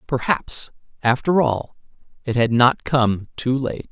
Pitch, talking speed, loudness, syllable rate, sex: 125 Hz, 140 wpm, -20 LUFS, 3.8 syllables/s, male